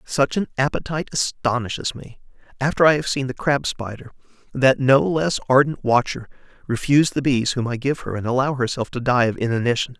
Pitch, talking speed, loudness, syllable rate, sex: 130 Hz, 185 wpm, -20 LUFS, 5.6 syllables/s, male